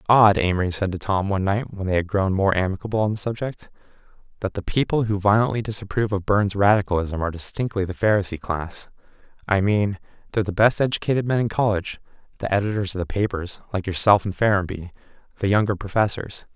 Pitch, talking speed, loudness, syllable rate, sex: 100 Hz, 180 wpm, -22 LUFS, 6.5 syllables/s, male